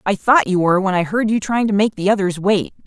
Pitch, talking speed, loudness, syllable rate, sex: 200 Hz, 295 wpm, -17 LUFS, 6.0 syllables/s, female